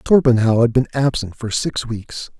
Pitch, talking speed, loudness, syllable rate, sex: 120 Hz, 175 wpm, -18 LUFS, 4.5 syllables/s, male